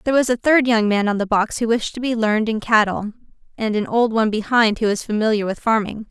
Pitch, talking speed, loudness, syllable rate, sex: 220 Hz, 255 wpm, -19 LUFS, 6.1 syllables/s, female